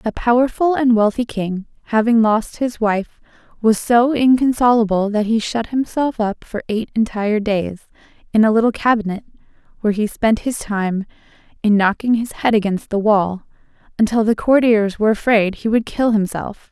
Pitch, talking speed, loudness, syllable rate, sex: 220 Hz, 165 wpm, -17 LUFS, 5.0 syllables/s, female